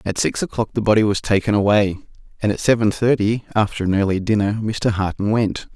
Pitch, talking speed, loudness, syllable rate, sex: 105 Hz, 200 wpm, -19 LUFS, 5.8 syllables/s, male